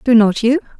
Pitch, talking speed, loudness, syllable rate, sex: 235 Hz, 225 wpm, -14 LUFS, 5.8 syllables/s, female